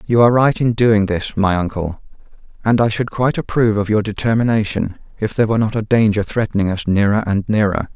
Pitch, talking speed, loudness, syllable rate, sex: 105 Hz, 205 wpm, -17 LUFS, 6.2 syllables/s, male